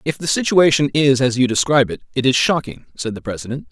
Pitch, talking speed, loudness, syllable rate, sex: 135 Hz, 225 wpm, -17 LUFS, 6.3 syllables/s, male